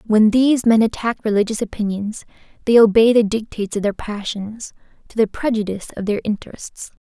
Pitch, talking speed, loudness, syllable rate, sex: 215 Hz, 160 wpm, -18 LUFS, 5.8 syllables/s, female